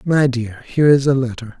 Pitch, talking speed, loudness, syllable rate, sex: 130 Hz, 225 wpm, -17 LUFS, 5.5 syllables/s, male